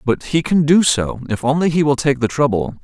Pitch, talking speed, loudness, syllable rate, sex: 140 Hz, 255 wpm, -16 LUFS, 5.4 syllables/s, male